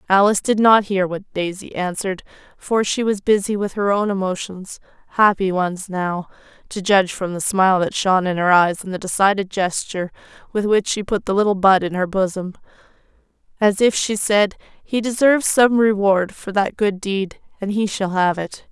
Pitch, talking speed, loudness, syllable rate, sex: 195 Hz, 185 wpm, -19 LUFS, 5.1 syllables/s, female